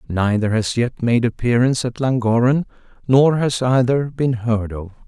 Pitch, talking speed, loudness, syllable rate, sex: 120 Hz, 155 wpm, -18 LUFS, 4.6 syllables/s, male